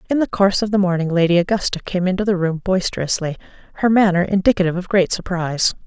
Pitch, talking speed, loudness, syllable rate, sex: 185 Hz, 195 wpm, -18 LUFS, 6.9 syllables/s, female